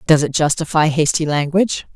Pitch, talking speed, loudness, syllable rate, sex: 155 Hz, 155 wpm, -17 LUFS, 5.7 syllables/s, female